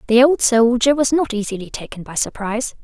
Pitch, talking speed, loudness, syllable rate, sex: 235 Hz, 190 wpm, -17 LUFS, 5.8 syllables/s, female